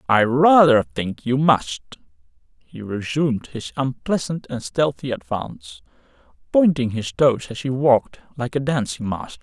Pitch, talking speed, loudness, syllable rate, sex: 125 Hz, 140 wpm, -20 LUFS, 4.5 syllables/s, male